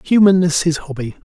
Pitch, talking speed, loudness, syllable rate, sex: 165 Hz, 135 wpm, -15 LUFS, 5.5 syllables/s, male